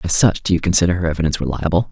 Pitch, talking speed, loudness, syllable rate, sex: 85 Hz, 250 wpm, -17 LUFS, 8.3 syllables/s, male